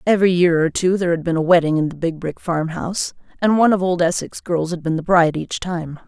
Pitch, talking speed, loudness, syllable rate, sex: 170 Hz, 255 wpm, -19 LUFS, 6.2 syllables/s, female